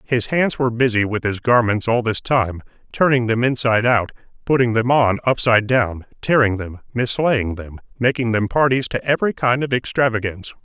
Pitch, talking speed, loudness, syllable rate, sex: 120 Hz, 175 wpm, -18 LUFS, 5.4 syllables/s, male